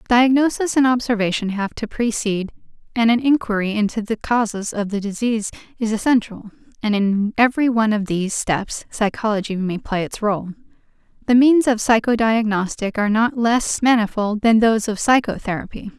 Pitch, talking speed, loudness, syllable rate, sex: 220 Hz, 155 wpm, -19 LUFS, 5.4 syllables/s, female